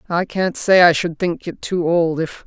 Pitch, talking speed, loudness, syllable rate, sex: 170 Hz, 245 wpm, -17 LUFS, 4.4 syllables/s, female